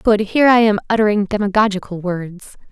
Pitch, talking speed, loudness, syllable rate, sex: 205 Hz, 155 wpm, -16 LUFS, 5.7 syllables/s, female